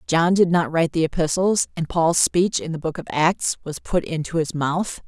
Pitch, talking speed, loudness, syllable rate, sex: 165 Hz, 225 wpm, -21 LUFS, 4.9 syllables/s, female